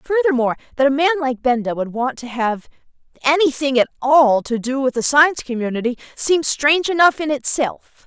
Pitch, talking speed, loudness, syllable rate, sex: 270 Hz, 180 wpm, -18 LUFS, 6.1 syllables/s, female